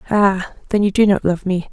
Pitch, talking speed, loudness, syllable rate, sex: 195 Hz, 245 wpm, -17 LUFS, 5.3 syllables/s, female